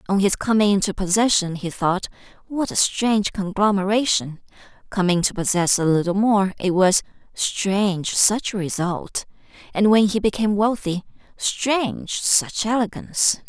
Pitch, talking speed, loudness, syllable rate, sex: 200 Hz, 135 wpm, -20 LUFS, 4.7 syllables/s, female